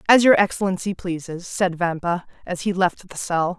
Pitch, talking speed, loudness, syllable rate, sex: 180 Hz, 185 wpm, -21 LUFS, 5.0 syllables/s, female